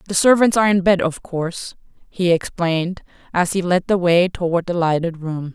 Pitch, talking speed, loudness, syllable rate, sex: 175 Hz, 195 wpm, -18 LUFS, 5.3 syllables/s, female